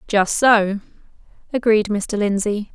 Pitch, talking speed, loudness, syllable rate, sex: 210 Hz, 110 wpm, -18 LUFS, 3.7 syllables/s, female